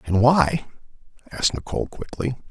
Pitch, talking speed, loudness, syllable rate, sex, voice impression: 105 Hz, 120 wpm, -22 LUFS, 4.8 syllables/s, male, very masculine, adult-like, thick, cool, slightly calm, slightly elegant, slightly wild